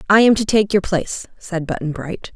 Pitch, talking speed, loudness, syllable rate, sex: 190 Hz, 230 wpm, -19 LUFS, 5.3 syllables/s, female